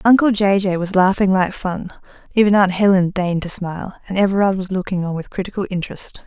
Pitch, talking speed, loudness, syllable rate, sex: 190 Hz, 200 wpm, -18 LUFS, 6.1 syllables/s, female